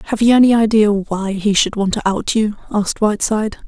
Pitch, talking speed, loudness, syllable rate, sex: 210 Hz, 210 wpm, -16 LUFS, 6.0 syllables/s, female